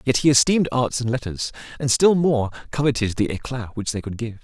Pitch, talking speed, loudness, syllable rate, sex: 120 Hz, 215 wpm, -21 LUFS, 5.9 syllables/s, male